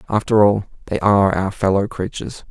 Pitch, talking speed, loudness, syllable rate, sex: 100 Hz, 165 wpm, -18 LUFS, 5.9 syllables/s, male